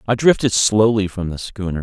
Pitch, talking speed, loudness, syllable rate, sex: 105 Hz, 195 wpm, -17 LUFS, 5.2 syllables/s, male